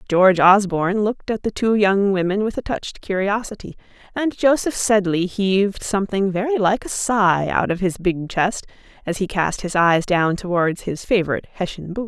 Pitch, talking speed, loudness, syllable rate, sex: 195 Hz, 185 wpm, -19 LUFS, 5.1 syllables/s, female